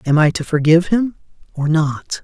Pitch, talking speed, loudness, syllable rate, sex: 165 Hz, 190 wpm, -16 LUFS, 5.1 syllables/s, male